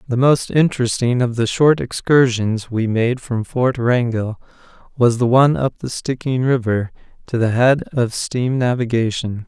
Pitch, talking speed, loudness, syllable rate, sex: 120 Hz, 160 wpm, -18 LUFS, 4.4 syllables/s, male